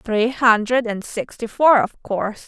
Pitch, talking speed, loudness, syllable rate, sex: 230 Hz, 170 wpm, -18 LUFS, 4.1 syllables/s, female